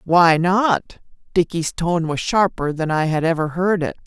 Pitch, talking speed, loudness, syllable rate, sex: 170 Hz, 175 wpm, -19 LUFS, 4.3 syllables/s, female